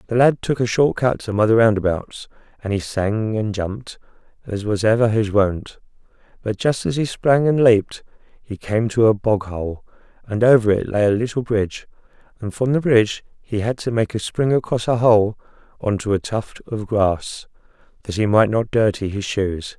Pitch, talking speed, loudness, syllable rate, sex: 110 Hz, 195 wpm, -19 LUFS, 4.9 syllables/s, male